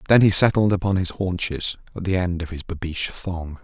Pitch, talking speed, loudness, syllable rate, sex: 90 Hz, 215 wpm, -22 LUFS, 5.3 syllables/s, male